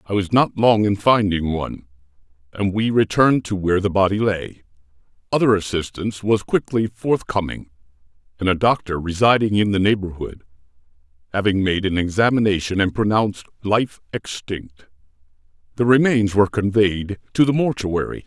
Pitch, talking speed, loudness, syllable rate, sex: 100 Hz, 140 wpm, -19 LUFS, 5.3 syllables/s, male